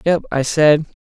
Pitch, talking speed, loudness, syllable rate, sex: 155 Hz, 175 wpm, -16 LUFS, 4.1 syllables/s, male